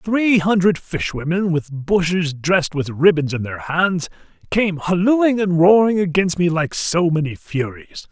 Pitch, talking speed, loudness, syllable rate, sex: 170 Hz, 155 wpm, -18 LUFS, 4.2 syllables/s, male